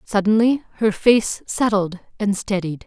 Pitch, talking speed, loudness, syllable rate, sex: 205 Hz, 125 wpm, -19 LUFS, 4.2 syllables/s, female